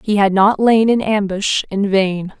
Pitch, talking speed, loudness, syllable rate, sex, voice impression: 205 Hz, 200 wpm, -15 LUFS, 4.0 syllables/s, female, feminine, adult-like, tensed, bright, slightly soft, clear, intellectual, calm, friendly, reassuring, elegant, lively, kind